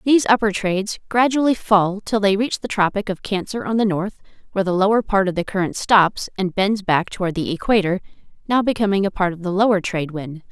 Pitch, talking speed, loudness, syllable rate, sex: 195 Hz, 215 wpm, -19 LUFS, 5.9 syllables/s, female